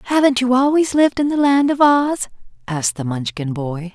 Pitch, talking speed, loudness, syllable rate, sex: 240 Hz, 200 wpm, -17 LUFS, 5.2 syllables/s, female